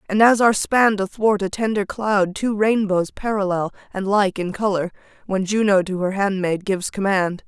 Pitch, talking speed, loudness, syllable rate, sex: 200 Hz, 175 wpm, -20 LUFS, 5.1 syllables/s, female